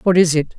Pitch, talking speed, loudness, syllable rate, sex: 170 Hz, 310 wpm, -15 LUFS, 6.3 syllables/s, female